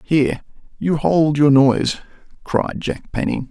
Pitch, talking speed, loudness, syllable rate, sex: 145 Hz, 135 wpm, -18 LUFS, 4.2 syllables/s, male